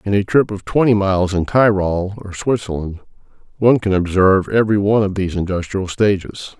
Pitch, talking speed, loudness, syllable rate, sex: 100 Hz, 175 wpm, -17 LUFS, 5.8 syllables/s, male